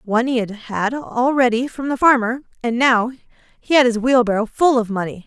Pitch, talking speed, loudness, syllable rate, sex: 240 Hz, 195 wpm, -18 LUFS, 5.2 syllables/s, female